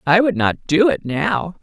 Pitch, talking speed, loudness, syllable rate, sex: 175 Hz, 220 wpm, -17 LUFS, 4.1 syllables/s, male